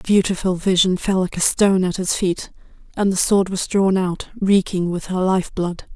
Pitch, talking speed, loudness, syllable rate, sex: 185 Hz, 210 wpm, -19 LUFS, 5.0 syllables/s, female